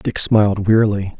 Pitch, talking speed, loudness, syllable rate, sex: 105 Hz, 150 wpm, -15 LUFS, 5.2 syllables/s, male